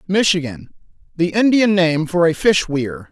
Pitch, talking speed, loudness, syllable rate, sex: 180 Hz, 135 wpm, -16 LUFS, 4.4 syllables/s, male